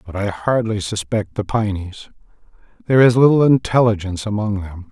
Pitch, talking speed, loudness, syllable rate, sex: 105 Hz, 145 wpm, -17 LUFS, 5.5 syllables/s, male